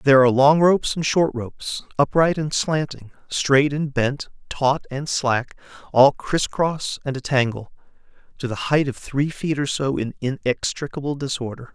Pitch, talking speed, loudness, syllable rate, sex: 140 Hz, 170 wpm, -21 LUFS, 4.6 syllables/s, male